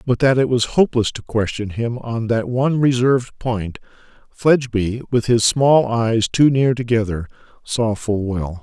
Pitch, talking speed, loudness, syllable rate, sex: 120 Hz, 165 wpm, -18 LUFS, 4.5 syllables/s, male